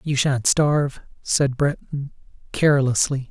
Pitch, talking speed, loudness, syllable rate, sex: 140 Hz, 110 wpm, -21 LUFS, 4.2 syllables/s, male